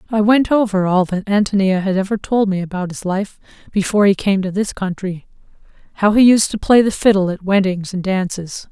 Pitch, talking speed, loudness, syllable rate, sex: 195 Hz, 205 wpm, -16 LUFS, 5.5 syllables/s, female